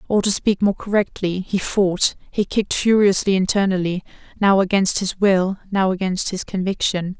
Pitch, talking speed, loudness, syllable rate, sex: 190 Hz, 160 wpm, -19 LUFS, 4.8 syllables/s, female